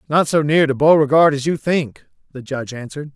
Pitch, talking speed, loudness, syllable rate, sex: 145 Hz, 230 wpm, -16 LUFS, 6.3 syllables/s, male